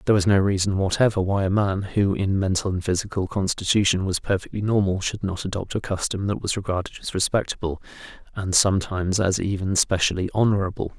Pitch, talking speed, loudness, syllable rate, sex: 95 Hz, 180 wpm, -23 LUFS, 6.1 syllables/s, male